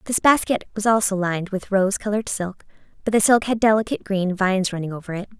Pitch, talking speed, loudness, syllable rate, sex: 200 Hz, 210 wpm, -21 LUFS, 6.4 syllables/s, female